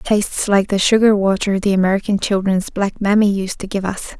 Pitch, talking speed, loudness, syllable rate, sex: 200 Hz, 215 wpm, -17 LUFS, 5.8 syllables/s, female